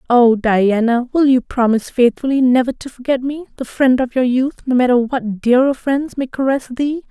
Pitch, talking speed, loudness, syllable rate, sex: 255 Hz, 195 wpm, -16 LUFS, 5.1 syllables/s, female